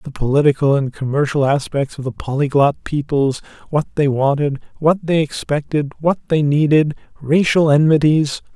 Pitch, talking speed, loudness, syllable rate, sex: 145 Hz, 140 wpm, -17 LUFS, 5.0 syllables/s, male